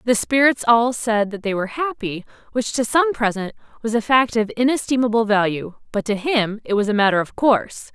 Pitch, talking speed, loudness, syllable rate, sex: 230 Hz, 205 wpm, -19 LUFS, 5.4 syllables/s, female